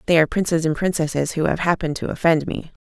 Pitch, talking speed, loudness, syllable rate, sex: 165 Hz, 235 wpm, -20 LUFS, 7.0 syllables/s, female